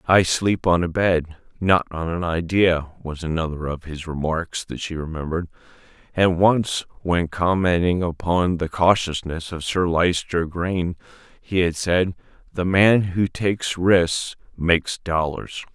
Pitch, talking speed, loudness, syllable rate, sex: 85 Hz, 145 wpm, -21 LUFS, 4.1 syllables/s, male